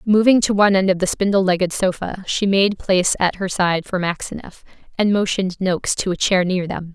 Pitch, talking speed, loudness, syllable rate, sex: 190 Hz, 215 wpm, -18 LUFS, 5.6 syllables/s, female